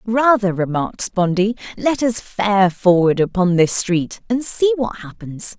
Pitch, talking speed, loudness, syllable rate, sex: 205 Hz, 150 wpm, -17 LUFS, 4.1 syllables/s, female